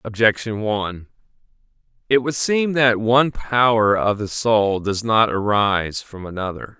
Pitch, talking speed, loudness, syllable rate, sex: 110 Hz, 140 wpm, -19 LUFS, 4.4 syllables/s, male